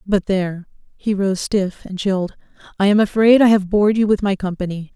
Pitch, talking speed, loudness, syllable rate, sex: 195 Hz, 180 wpm, -18 LUFS, 5.9 syllables/s, female